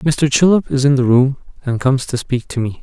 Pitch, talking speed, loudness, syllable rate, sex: 135 Hz, 255 wpm, -15 LUFS, 5.6 syllables/s, male